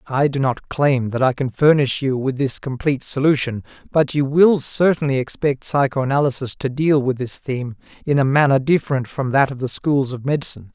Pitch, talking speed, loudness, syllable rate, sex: 135 Hz, 195 wpm, -19 LUFS, 5.4 syllables/s, male